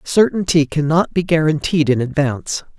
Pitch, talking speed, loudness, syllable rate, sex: 155 Hz, 130 wpm, -17 LUFS, 5.0 syllables/s, male